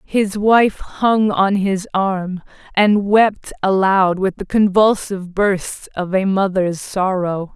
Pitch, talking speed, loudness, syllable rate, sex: 195 Hz, 135 wpm, -17 LUFS, 3.3 syllables/s, female